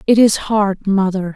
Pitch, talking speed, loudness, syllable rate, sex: 200 Hz, 180 wpm, -15 LUFS, 4.2 syllables/s, female